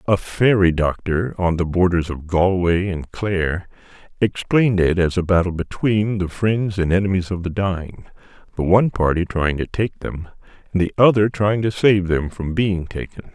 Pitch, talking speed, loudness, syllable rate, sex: 95 Hz, 175 wpm, -19 LUFS, 4.7 syllables/s, male